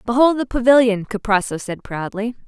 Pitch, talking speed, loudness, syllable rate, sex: 225 Hz, 145 wpm, -18 LUFS, 5.3 syllables/s, female